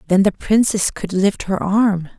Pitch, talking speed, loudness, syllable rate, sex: 195 Hz, 190 wpm, -17 LUFS, 4.1 syllables/s, female